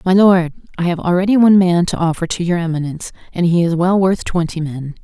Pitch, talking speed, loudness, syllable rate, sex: 175 Hz, 215 wpm, -15 LUFS, 6.1 syllables/s, female